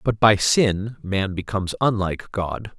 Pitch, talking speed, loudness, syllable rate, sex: 100 Hz, 150 wpm, -21 LUFS, 4.3 syllables/s, male